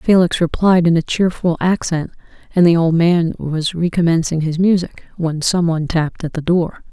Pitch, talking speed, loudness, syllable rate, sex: 170 Hz, 175 wpm, -16 LUFS, 5.0 syllables/s, female